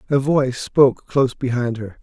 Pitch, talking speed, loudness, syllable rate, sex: 130 Hz, 180 wpm, -19 LUFS, 5.5 syllables/s, male